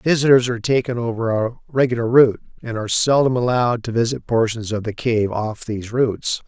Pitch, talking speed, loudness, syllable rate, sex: 120 Hz, 185 wpm, -19 LUFS, 5.9 syllables/s, male